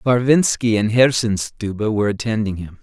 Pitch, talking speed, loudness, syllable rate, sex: 110 Hz, 125 wpm, -18 LUFS, 5.0 syllables/s, male